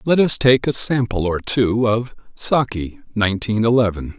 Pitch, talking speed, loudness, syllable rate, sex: 115 Hz, 160 wpm, -18 LUFS, 4.6 syllables/s, male